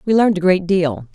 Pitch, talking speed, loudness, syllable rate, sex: 180 Hz, 260 wpm, -16 LUFS, 6.2 syllables/s, female